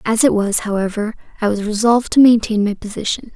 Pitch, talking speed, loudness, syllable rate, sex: 215 Hz, 195 wpm, -16 LUFS, 6.0 syllables/s, female